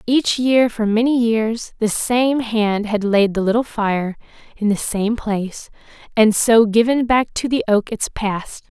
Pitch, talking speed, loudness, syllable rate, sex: 220 Hz, 180 wpm, -18 LUFS, 4.0 syllables/s, female